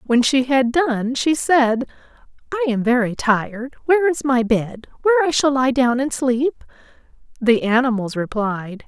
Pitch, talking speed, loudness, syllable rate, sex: 255 Hz, 160 wpm, -18 LUFS, 4.4 syllables/s, female